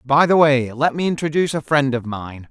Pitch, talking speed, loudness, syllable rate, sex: 140 Hz, 240 wpm, -18 LUFS, 5.4 syllables/s, male